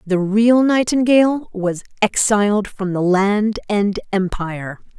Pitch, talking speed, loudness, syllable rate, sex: 205 Hz, 120 wpm, -17 LUFS, 3.9 syllables/s, female